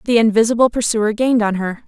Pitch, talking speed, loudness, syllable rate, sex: 225 Hz, 190 wpm, -16 LUFS, 6.4 syllables/s, female